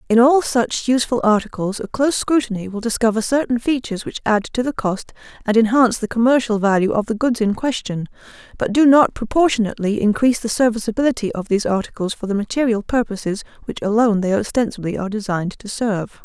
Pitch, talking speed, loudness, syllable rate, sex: 225 Hz, 180 wpm, -18 LUFS, 6.4 syllables/s, female